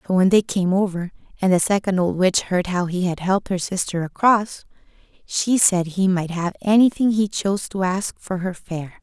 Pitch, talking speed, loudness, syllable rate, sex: 190 Hz, 205 wpm, -20 LUFS, 5.0 syllables/s, female